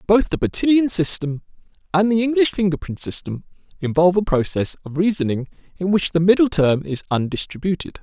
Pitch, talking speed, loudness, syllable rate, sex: 180 Hz, 155 wpm, -19 LUFS, 5.8 syllables/s, male